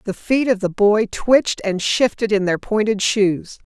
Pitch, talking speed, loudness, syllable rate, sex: 210 Hz, 195 wpm, -18 LUFS, 4.3 syllables/s, female